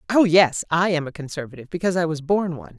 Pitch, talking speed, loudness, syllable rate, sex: 165 Hz, 215 wpm, -21 LUFS, 7.3 syllables/s, female